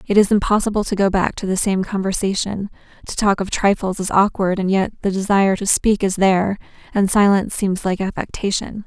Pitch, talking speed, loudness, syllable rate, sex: 195 Hz, 195 wpm, -18 LUFS, 5.7 syllables/s, female